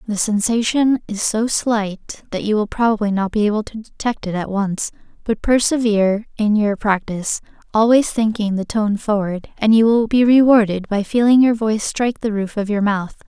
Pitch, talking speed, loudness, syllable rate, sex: 215 Hz, 190 wpm, -18 LUFS, 5.0 syllables/s, female